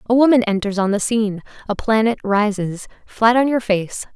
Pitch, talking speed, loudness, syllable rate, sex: 215 Hz, 190 wpm, -18 LUFS, 5.1 syllables/s, female